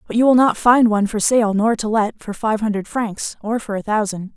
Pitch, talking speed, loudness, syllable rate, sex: 220 Hz, 260 wpm, -18 LUFS, 5.3 syllables/s, female